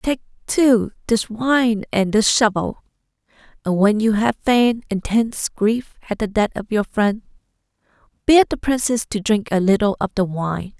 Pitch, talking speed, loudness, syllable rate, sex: 220 Hz, 165 wpm, -19 LUFS, 4.4 syllables/s, female